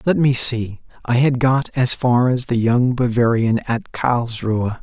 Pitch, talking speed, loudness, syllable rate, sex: 120 Hz, 175 wpm, -18 LUFS, 4.1 syllables/s, male